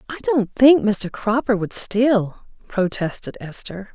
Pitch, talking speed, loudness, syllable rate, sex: 220 Hz, 135 wpm, -19 LUFS, 3.8 syllables/s, female